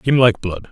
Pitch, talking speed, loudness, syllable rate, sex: 110 Hz, 255 wpm, -16 LUFS, 5.0 syllables/s, male